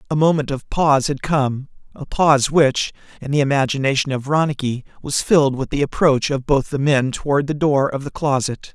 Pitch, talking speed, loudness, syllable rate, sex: 140 Hz, 200 wpm, -18 LUFS, 5.4 syllables/s, male